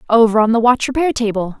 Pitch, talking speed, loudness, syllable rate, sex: 230 Hz, 225 wpm, -15 LUFS, 6.5 syllables/s, female